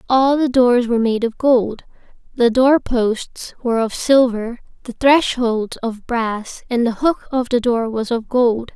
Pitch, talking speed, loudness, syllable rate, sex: 240 Hz, 170 wpm, -17 LUFS, 4.0 syllables/s, female